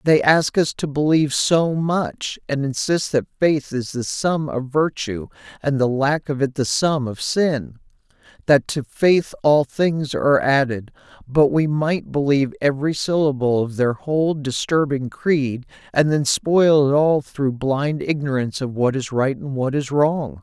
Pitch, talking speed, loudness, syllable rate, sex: 140 Hz, 175 wpm, -20 LUFS, 4.2 syllables/s, male